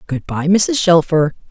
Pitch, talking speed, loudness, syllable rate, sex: 170 Hz, 160 wpm, -15 LUFS, 4.1 syllables/s, female